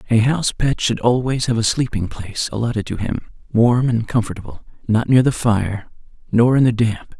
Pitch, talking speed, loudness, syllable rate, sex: 115 Hz, 190 wpm, -18 LUFS, 5.3 syllables/s, male